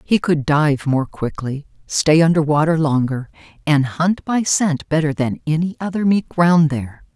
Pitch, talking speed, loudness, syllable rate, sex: 155 Hz, 170 wpm, -18 LUFS, 4.4 syllables/s, female